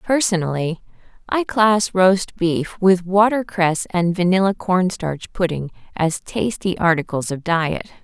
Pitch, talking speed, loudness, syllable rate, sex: 185 Hz, 120 wpm, -19 LUFS, 4.0 syllables/s, female